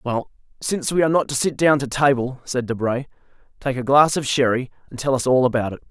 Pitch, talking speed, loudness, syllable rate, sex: 130 Hz, 235 wpm, -20 LUFS, 6.2 syllables/s, male